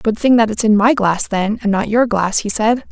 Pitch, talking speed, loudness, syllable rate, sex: 220 Hz, 290 wpm, -15 LUFS, 5.1 syllables/s, female